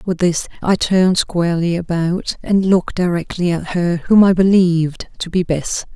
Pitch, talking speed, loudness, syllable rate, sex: 175 Hz, 170 wpm, -16 LUFS, 4.7 syllables/s, female